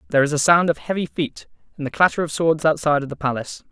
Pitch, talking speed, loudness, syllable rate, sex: 155 Hz, 260 wpm, -20 LUFS, 7.3 syllables/s, male